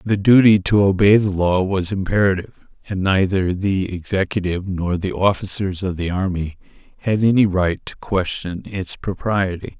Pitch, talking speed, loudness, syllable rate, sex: 95 Hz, 155 wpm, -19 LUFS, 4.8 syllables/s, male